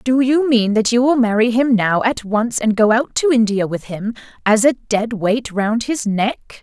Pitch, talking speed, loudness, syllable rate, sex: 230 Hz, 225 wpm, -16 LUFS, 4.3 syllables/s, female